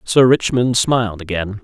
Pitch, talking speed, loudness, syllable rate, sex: 115 Hz, 145 wpm, -16 LUFS, 4.6 syllables/s, male